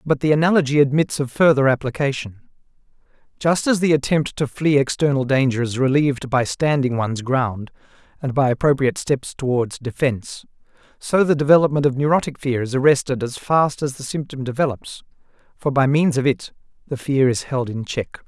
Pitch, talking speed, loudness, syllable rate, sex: 135 Hz, 170 wpm, -19 LUFS, 5.5 syllables/s, male